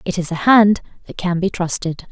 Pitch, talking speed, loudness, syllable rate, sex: 185 Hz, 225 wpm, -17 LUFS, 5.2 syllables/s, female